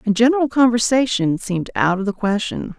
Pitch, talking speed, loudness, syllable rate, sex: 220 Hz, 170 wpm, -18 LUFS, 5.7 syllables/s, female